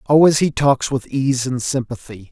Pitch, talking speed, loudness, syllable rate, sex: 130 Hz, 180 wpm, -17 LUFS, 4.6 syllables/s, male